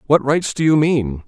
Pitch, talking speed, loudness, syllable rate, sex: 140 Hz, 235 wpm, -17 LUFS, 4.5 syllables/s, male